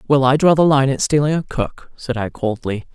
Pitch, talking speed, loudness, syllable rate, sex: 140 Hz, 245 wpm, -17 LUFS, 5.2 syllables/s, female